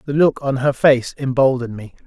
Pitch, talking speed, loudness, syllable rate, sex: 135 Hz, 205 wpm, -17 LUFS, 5.6 syllables/s, male